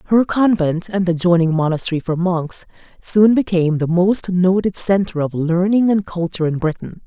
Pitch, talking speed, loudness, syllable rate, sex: 180 Hz, 160 wpm, -17 LUFS, 5.1 syllables/s, female